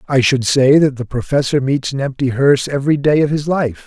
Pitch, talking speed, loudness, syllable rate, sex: 135 Hz, 235 wpm, -15 LUFS, 5.7 syllables/s, male